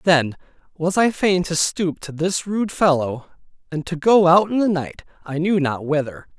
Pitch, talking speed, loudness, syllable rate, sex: 170 Hz, 195 wpm, -19 LUFS, 4.5 syllables/s, male